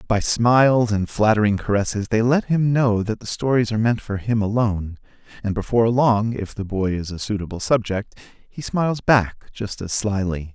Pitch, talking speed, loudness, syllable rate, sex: 110 Hz, 190 wpm, -20 LUFS, 5.2 syllables/s, male